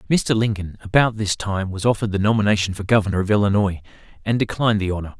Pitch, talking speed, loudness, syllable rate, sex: 105 Hz, 195 wpm, -20 LUFS, 7.0 syllables/s, male